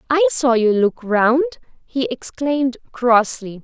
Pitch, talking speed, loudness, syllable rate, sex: 270 Hz, 130 wpm, -18 LUFS, 3.8 syllables/s, female